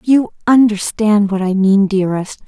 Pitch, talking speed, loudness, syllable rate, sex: 205 Hz, 145 wpm, -14 LUFS, 4.6 syllables/s, female